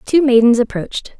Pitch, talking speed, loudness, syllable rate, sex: 245 Hz, 150 wpm, -14 LUFS, 5.7 syllables/s, female